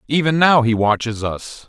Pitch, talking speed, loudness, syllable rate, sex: 125 Hz, 180 wpm, -16 LUFS, 4.6 syllables/s, male